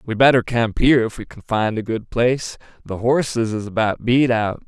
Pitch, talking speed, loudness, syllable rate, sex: 115 Hz, 220 wpm, -19 LUFS, 5.2 syllables/s, male